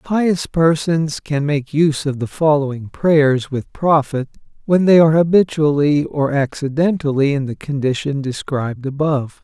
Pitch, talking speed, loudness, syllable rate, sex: 150 Hz, 140 wpm, -17 LUFS, 4.6 syllables/s, male